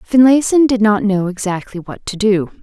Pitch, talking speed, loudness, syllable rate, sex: 215 Hz, 185 wpm, -14 LUFS, 4.9 syllables/s, female